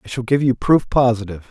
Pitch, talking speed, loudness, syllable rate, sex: 120 Hz, 240 wpm, -17 LUFS, 6.4 syllables/s, male